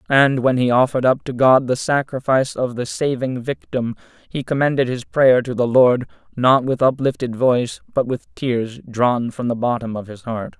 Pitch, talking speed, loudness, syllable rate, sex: 125 Hz, 195 wpm, -19 LUFS, 4.9 syllables/s, male